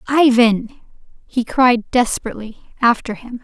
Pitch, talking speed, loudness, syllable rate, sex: 235 Hz, 105 wpm, -16 LUFS, 4.6 syllables/s, female